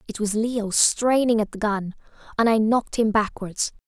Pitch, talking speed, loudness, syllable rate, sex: 215 Hz, 185 wpm, -22 LUFS, 4.8 syllables/s, female